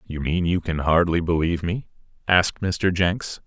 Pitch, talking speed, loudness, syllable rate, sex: 85 Hz, 175 wpm, -22 LUFS, 4.8 syllables/s, male